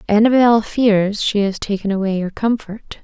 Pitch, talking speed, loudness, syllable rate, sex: 210 Hz, 160 wpm, -17 LUFS, 4.5 syllables/s, female